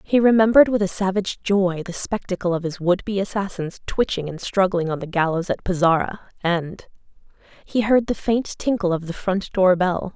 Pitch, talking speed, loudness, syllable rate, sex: 190 Hz, 185 wpm, -21 LUFS, 5.3 syllables/s, female